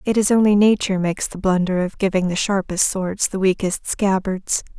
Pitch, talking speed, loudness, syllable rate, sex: 190 Hz, 190 wpm, -19 LUFS, 5.3 syllables/s, female